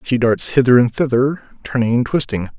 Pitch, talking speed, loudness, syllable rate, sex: 125 Hz, 185 wpm, -16 LUFS, 5.4 syllables/s, male